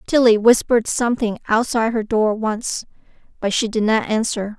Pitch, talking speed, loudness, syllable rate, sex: 225 Hz, 155 wpm, -18 LUFS, 5.2 syllables/s, female